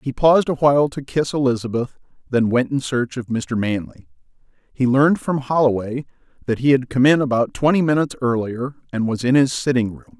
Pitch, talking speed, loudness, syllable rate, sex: 130 Hz, 195 wpm, -19 LUFS, 5.8 syllables/s, male